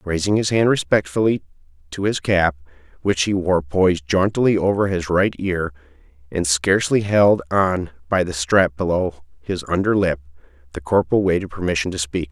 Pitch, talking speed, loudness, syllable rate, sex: 90 Hz, 160 wpm, -19 LUFS, 5.2 syllables/s, male